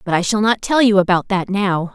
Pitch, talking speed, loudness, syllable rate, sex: 195 Hz, 280 wpm, -16 LUFS, 5.4 syllables/s, female